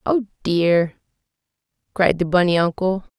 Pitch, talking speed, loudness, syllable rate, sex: 185 Hz, 115 wpm, -19 LUFS, 4.5 syllables/s, female